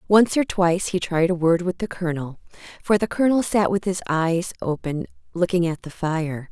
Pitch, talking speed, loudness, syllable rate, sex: 180 Hz, 205 wpm, -22 LUFS, 5.3 syllables/s, female